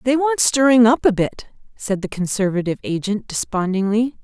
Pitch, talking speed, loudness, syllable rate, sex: 220 Hz, 155 wpm, -18 LUFS, 5.3 syllables/s, female